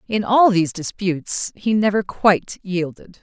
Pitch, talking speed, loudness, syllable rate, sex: 190 Hz, 150 wpm, -19 LUFS, 4.7 syllables/s, female